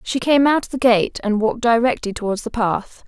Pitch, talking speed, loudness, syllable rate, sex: 230 Hz, 235 wpm, -18 LUFS, 5.4 syllables/s, female